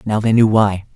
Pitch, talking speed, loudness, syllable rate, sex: 105 Hz, 250 wpm, -15 LUFS, 5.1 syllables/s, male